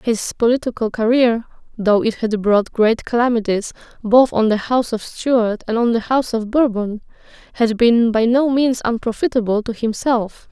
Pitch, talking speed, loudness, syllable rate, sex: 230 Hz, 165 wpm, -17 LUFS, 4.8 syllables/s, female